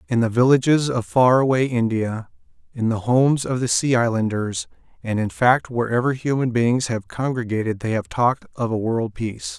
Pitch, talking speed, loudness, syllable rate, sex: 120 Hz, 180 wpm, -20 LUFS, 5.2 syllables/s, male